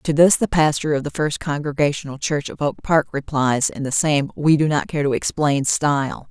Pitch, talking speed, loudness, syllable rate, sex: 150 Hz, 220 wpm, -19 LUFS, 5.0 syllables/s, female